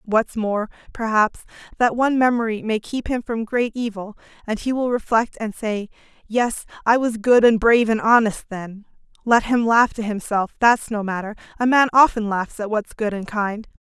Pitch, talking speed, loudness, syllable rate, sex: 220 Hz, 190 wpm, -20 LUFS, 4.9 syllables/s, female